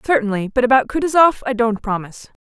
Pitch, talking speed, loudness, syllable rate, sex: 235 Hz, 170 wpm, -17 LUFS, 6.6 syllables/s, female